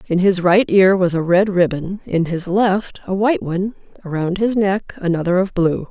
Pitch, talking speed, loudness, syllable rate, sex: 185 Hz, 205 wpm, -17 LUFS, 4.9 syllables/s, female